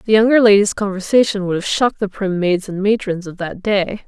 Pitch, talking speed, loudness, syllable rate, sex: 200 Hz, 220 wpm, -16 LUFS, 5.5 syllables/s, female